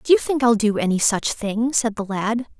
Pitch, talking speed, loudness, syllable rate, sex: 225 Hz, 255 wpm, -20 LUFS, 5.0 syllables/s, female